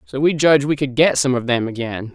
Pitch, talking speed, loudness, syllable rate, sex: 135 Hz, 280 wpm, -17 LUFS, 5.9 syllables/s, male